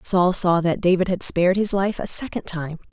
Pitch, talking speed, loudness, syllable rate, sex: 180 Hz, 225 wpm, -20 LUFS, 5.2 syllables/s, female